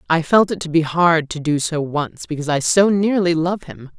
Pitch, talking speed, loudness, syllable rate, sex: 165 Hz, 240 wpm, -18 LUFS, 5.0 syllables/s, female